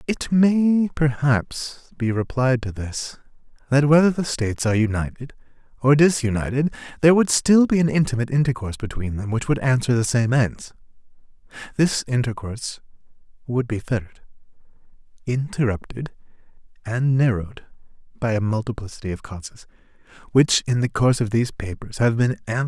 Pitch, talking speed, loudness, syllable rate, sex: 125 Hz, 145 wpm, -21 LUFS, 5.6 syllables/s, male